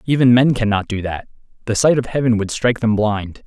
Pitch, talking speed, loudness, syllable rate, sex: 115 Hz, 225 wpm, -17 LUFS, 5.8 syllables/s, male